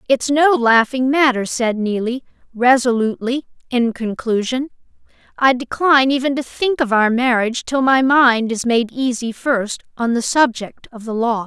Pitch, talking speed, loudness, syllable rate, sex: 245 Hz, 155 wpm, -17 LUFS, 4.7 syllables/s, female